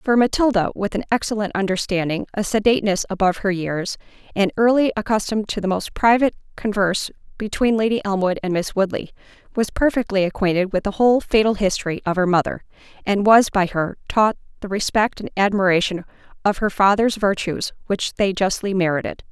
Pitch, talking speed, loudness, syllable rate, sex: 200 Hz, 165 wpm, -20 LUFS, 5.1 syllables/s, female